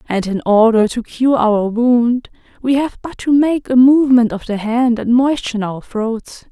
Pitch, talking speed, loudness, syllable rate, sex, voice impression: 240 Hz, 195 wpm, -15 LUFS, 4.2 syllables/s, female, feminine, adult-like, slightly calm, elegant, slightly sweet